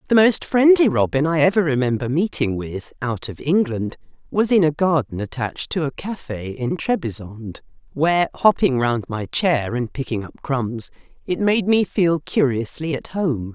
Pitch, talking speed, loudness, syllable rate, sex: 150 Hz, 170 wpm, -20 LUFS, 4.6 syllables/s, female